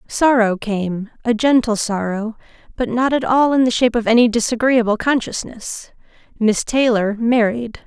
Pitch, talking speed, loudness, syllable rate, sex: 230 Hz, 120 wpm, -17 LUFS, 4.7 syllables/s, female